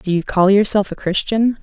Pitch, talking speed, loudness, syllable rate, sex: 200 Hz, 220 wpm, -16 LUFS, 5.1 syllables/s, female